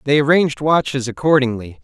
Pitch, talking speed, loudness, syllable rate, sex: 140 Hz, 130 wpm, -16 LUFS, 5.9 syllables/s, male